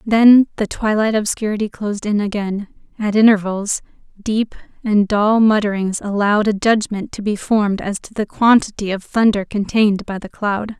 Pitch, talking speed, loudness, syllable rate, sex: 210 Hz, 160 wpm, -17 LUFS, 5.0 syllables/s, female